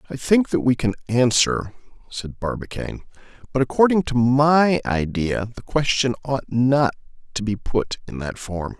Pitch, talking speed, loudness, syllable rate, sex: 125 Hz, 155 wpm, -21 LUFS, 4.5 syllables/s, male